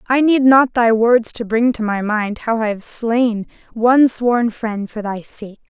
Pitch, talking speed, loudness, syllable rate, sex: 230 Hz, 205 wpm, -16 LUFS, 4.0 syllables/s, female